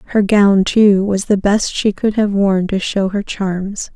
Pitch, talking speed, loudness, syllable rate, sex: 200 Hz, 215 wpm, -15 LUFS, 3.8 syllables/s, female